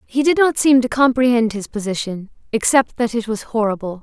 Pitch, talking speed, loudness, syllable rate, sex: 235 Hz, 195 wpm, -17 LUFS, 5.4 syllables/s, female